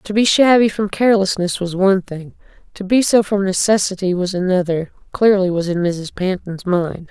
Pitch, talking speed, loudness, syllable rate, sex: 190 Hz, 170 wpm, -16 LUFS, 5.1 syllables/s, female